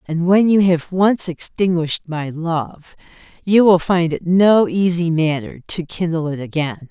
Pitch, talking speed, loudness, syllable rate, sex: 170 Hz, 165 wpm, -17 LUFS, 4.2 syllables/s, female